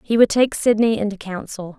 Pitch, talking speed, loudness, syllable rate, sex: 210 Hz, 200 wpm, -19 LUFS, 5.3 syllables/s, female